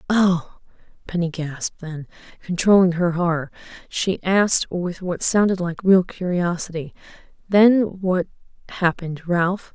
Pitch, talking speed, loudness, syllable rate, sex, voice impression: 180 Hz, 110 wpm, -20 LUFS, 4.2 syllables/s, female, feminine, adult-like, relaxed, weak, slightly dark, muffled, calm, slightly reassuring, unique, modest